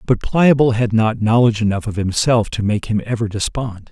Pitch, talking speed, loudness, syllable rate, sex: 110 Hz, 200 wpm, -17 LUFS, 5.3 syllables/s, male